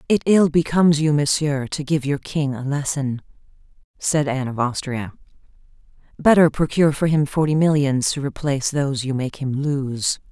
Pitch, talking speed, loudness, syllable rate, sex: 145 Hz, 165 wpm, -20 LUFS, 5.1 syllables/s, female